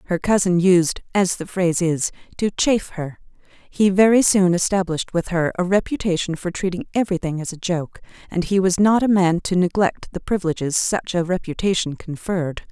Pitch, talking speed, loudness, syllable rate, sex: 180 Hz, 180 wpm, -20 LUFS, 5.4 syllables/s, female